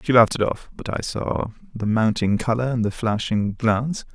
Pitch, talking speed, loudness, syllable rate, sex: 115 Hz, 205 wpm, -22 LUFS, 5.1 syllables/s, male